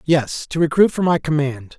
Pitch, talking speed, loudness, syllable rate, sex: 150 Hz, 200 wpm, -18 LUFS, 4.9 syllables/s, male